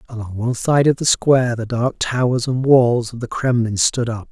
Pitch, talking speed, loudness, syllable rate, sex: 120 Hz, 220 wpm, -17 LUFS, 5.1 syllables/s, male